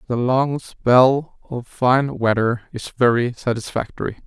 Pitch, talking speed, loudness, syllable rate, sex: 125 Hz, 125 wpm, -19 LUFS, 3.8 syllables/s, male